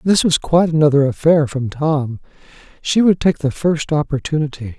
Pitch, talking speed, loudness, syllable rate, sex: 150 Hz, 165 wpm, -16 LUFS, 5.1 syllables/s, male